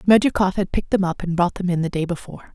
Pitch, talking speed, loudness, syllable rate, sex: 180 Hz, 285 wpm, -21 LUFS, 7.1 syllables/s, female